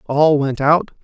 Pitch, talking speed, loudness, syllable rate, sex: 150 Hz, 175 wpm, -16 LUFS, 3.5 syllables/s, male